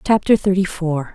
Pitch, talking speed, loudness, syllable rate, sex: 180 Hz, 155 wpm, -18 LUFS, 4.9 syllables/s, female